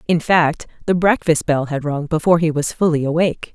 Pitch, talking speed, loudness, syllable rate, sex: 160 Hz, 205 wpm, -17 LUFS, 5.6 syllables/s, female